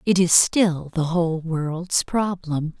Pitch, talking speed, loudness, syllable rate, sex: 170 Hz, 150 wpm, -21 LUFS, 3.5 syllables/s, female